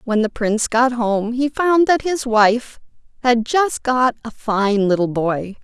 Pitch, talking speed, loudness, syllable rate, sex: 235 Hz, 180 wpm, -18 LUFS, 3.9 syllables/s, female